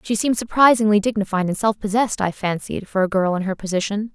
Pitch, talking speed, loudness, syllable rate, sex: 205 Hz, 215 wpm, -20 LUFS, 6.4 syllables/s, female